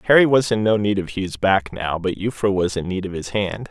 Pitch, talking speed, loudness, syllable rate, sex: 100 Hz, 275 wpm, -20 LUFS, 5.4 syllables/s, male